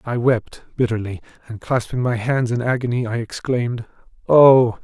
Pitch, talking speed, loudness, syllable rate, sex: 120 Hz, 150 wpm, -19 LUFS, 4.9 syllables/s, male